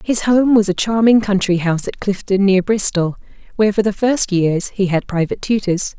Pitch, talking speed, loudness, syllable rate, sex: 200 Hz, 200 wpm, -16 LUFS, 5.3 syllables/s, female